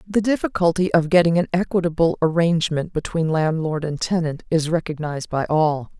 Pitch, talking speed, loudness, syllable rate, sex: 165 Hz, 150 wpm, -20 LUFS, 5.5 syllables/s, female